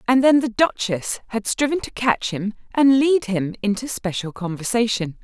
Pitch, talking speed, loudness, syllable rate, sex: 230 Hz, 170 wpm, -21 LUFS, 4.7 syllables/s, female